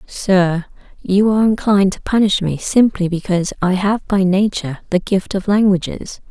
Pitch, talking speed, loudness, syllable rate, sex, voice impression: 195 Hz, 160 wpm, -16 LUFS, 4.9 syllables/s, female, feminine, adult-like, calm, slightly reassuring, elegant